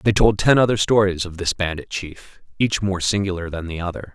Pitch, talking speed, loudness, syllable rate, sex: 95 Hz, 215 wpm, -20 LUFS, 5.4 syllables/s, male